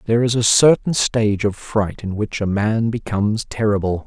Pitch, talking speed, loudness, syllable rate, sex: 110 Hz, 190 wpm, -18 LUFS, 5.1 syllables/s, male